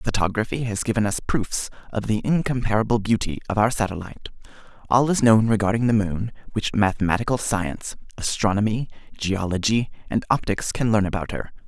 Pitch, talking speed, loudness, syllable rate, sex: 110 Hz, 150 wpm, -23 LUFS, 5.7 syllables/s, male